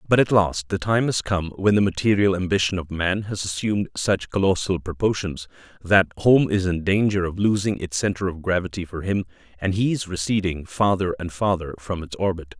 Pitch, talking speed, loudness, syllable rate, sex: 95 Hz, 195 wpm, -22 LUFS, 5.4 syllables/s, male